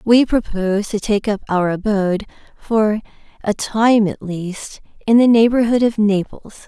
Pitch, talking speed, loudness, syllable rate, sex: 210 Hz, 155 wpm, -17 LUFS, 4.4 syllables/s, female